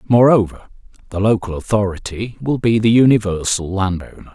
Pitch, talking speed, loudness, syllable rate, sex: 105 Hz, 125 wpm, -17 LUFS, 5.5 syllables/s, male